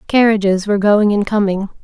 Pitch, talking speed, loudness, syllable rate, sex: 205 Hz, 165 wpm, -14 LUFS, 5.7 syllables/s, female